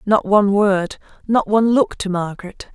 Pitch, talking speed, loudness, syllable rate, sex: 200 Hz, 175 wpm, -17 LUFS, 5.1 syllables/s, female